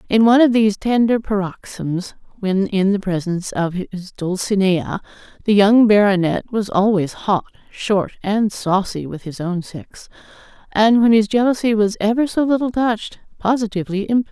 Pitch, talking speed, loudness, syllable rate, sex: 205 Hz, 155 wpm, -18 LUFS, 5.1 syllables/s, female